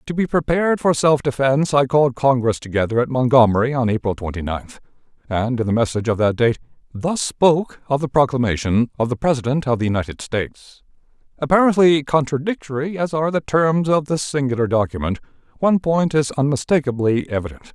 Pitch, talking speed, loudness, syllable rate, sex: 135 Hz, 170 wpm, -19 LUFS, 6.0 syllables/s, male